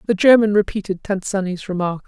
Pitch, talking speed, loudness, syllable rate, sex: 200 Hz, 175 wpm, -18 LUFS, 5.8 syllables/s, female